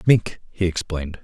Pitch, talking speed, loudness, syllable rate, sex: 90 Hz, 145 wpm, -23 LUFS, 5.0 syllables/s, male